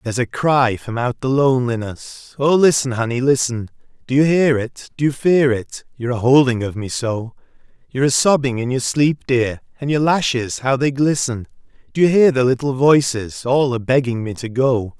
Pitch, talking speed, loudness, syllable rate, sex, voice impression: 130 Hz, 195 wpm, -17 LUFS, 5.0 syllables/s, male, very masculine, adult-like, thick, very tensed, powerful, bright, soft, very clear, fluent, slightly raspy, cool, intellectual, very refreshing, sincere, very calm, mature, very friendly, very reassuring, very unique, very elegant, wild, sweet, lively, very kind, slightly modest